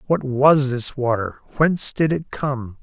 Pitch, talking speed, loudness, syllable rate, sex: 135 Hz, 170 wpm, -19 LUFS, 4.0 syllables/s, male